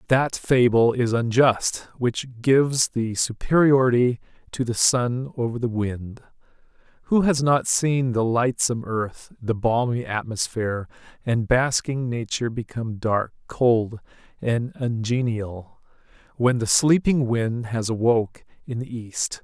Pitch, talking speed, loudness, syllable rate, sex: 120 Hz, 125 wpm, -22 LUFS, 4.1 syllables/s, male